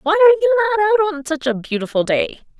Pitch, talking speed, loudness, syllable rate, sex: 305 Hz, 230 wpm, -17 LUFS, 8.7 syllables/s, female